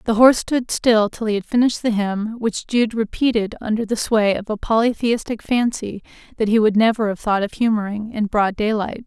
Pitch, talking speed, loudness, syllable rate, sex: 220 Hz, 205 wpm, -19 LUFS, 5.3 syllables/s, female